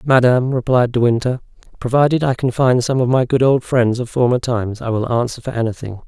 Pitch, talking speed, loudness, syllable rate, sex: 125 Hz, 215 wpm, -17 LUFS, 5.9 syllables/s, male